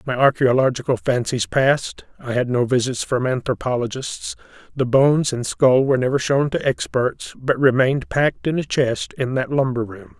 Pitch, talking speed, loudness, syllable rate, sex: 130 Hz, 170 wpm, -20 LUFS, 5.1 syllables/s, male